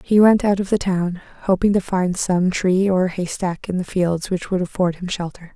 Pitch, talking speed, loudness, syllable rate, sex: 185 Hz, 225 wpm, -20 LUFS, 4.8 syllables/s, female